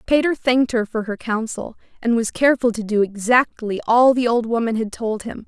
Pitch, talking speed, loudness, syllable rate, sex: 230 Hz, 210 wpm, -19 LUFS, 5.4 syllables/s, female